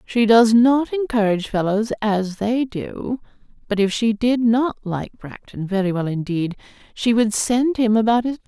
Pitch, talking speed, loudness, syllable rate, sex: 220 Hz, 175 wpm, -19 LUFS, 4.8 syllables/s, female